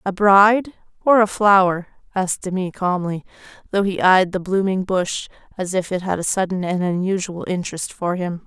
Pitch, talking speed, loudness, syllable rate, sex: 185 Hz, 175 wpm, -19 LUFS, 5.1 syllables/s, female